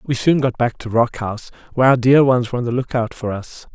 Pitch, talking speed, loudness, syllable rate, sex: 125 Hz, 290 wpm, -17 LUFS, 6.1 syllables/s, male